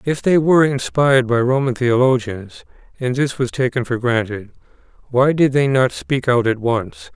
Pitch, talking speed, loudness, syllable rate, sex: 130 Hz, 175 wpm, -17 LUFS, 3.9 syllables/s, male